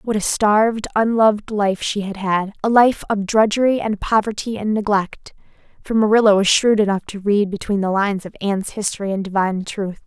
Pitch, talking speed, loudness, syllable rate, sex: 205 Hz, 190 wpm, -18 LUFS, 5.5 syllables/s, female